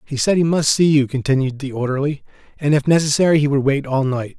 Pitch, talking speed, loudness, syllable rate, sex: 140 Hz, 235 wpm, -17 LUFS, 6.2 syllables/s, male